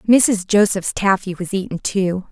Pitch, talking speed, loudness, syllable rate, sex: 195 Hz, 155 wpm, -18 LUFS, 4.3 syllables/s, female